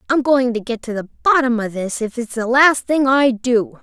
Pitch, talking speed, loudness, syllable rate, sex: 245 Hz, 250 wpm, -17 LUFS, 4.9 syllables/s, female